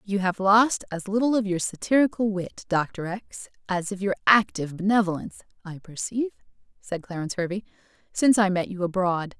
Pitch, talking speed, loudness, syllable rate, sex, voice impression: 195 Hz, 165 wpm, -24 LUFS, 5.6 syllables/s, female, feminine, adult-like, tensed, powerful, bright, slightly raspy, friendly, unique, intense